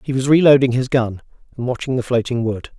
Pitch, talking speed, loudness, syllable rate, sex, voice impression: 125 Hz, 215 wpm, -17 LUFS, 6.1 syllables/s, male, masculine, adult-like, slightly weak, soft, fluent, slightly raspy, intellectual, sincere, calm, slightly friendly, reassuring, slightly wild, kind, modest